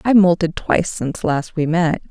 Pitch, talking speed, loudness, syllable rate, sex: 170 Hz, 200 wpm, -18 LUFS, 5.7 syllables/s, female